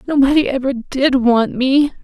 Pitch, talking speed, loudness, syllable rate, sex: 265 Hz, 145 wpm, -15 LUFS, 4.5 syllables/s, female